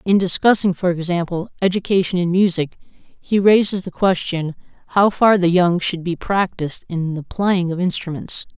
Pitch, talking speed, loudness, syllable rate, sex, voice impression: 180 Hz, 160 wpm, -18 LUFS, 4.8 syllables/s, female, feminine, very adult-like, intellectual, elegant, slightly strict